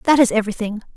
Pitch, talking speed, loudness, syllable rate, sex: 230 Hz, 190 wpm, -19 LUFS, 8.3 syllables/s, female